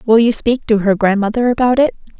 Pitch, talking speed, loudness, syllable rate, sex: 225 Hz, 220 wpm, -14 LUFS, 5.9 syllables/s, female